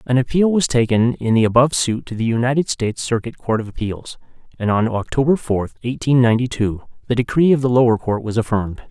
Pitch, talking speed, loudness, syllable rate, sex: 120 Hz, 210 wpm, -18 LUFS, 6.1 syllables/s, male